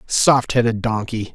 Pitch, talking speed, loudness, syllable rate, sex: 115 Hz, 135 wpm, -18 LUFS, 4.1 syllables/s, male